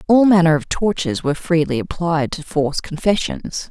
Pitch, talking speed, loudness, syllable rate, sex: 165 Hz, 160 wpm, -18 LUFS, 5.4 syllables/s, female